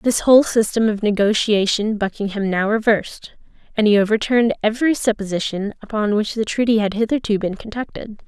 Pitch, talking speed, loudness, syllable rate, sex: 215 Hz, 150 wpm, -18 LUFS, 5.8 syllables/s, female